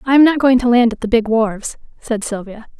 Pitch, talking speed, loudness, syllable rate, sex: 235 Hz, 255 wpm, -15 LUFS, 5.8 syllables/s, female